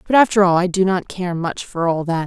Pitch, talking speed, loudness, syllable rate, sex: 180 Hz, 290 wpm, -18 LUFS, 5.5 syllables/s, female